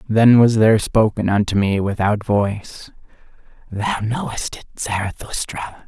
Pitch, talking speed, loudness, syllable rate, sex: 110 Hz, 120 wpm, -18 LUFS, 4.4 syllables/s, male